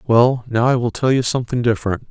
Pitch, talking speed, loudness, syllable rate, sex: 120 Hz, 230 wpm, -18 LUFS, 6.2 syllables/s, male